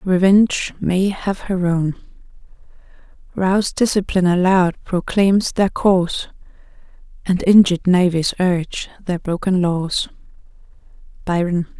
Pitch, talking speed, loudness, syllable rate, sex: 185 Hz, 95 wpm, -17 LUFS, 4.4 syllables/s, female